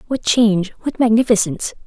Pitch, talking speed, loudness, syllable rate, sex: 220 Hz, 95 wpm, -16 LUFS, 6.1 syllables/s, female